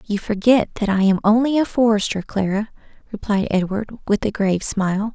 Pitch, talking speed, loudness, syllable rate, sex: 210 Hz, 175 wpm, -19 LUFS, 5.6 syllables/s, female